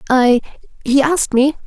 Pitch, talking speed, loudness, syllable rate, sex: 270 Hz, 110 wpm, -15 LUFS, 5.3 syllables/s, female